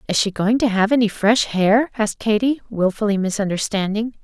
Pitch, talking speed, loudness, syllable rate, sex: 215 Hz, 170 wpm, -19 LUFS, 5.4 syllables/s, female